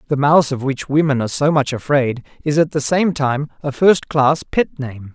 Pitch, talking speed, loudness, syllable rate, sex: 140 Hz, 220 wpm, -17 LUFS, 5.0 syllables/s, male